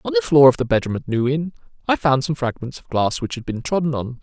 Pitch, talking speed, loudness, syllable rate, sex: 145 Hz, 285 wpm, -19 LUFS, 6.2 syllables/s, male